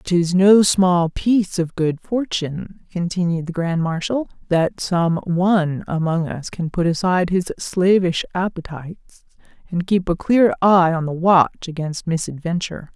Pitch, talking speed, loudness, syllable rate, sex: 175 Hz, 150 wpm, -19 LUFS, 4.3 syllables/s, female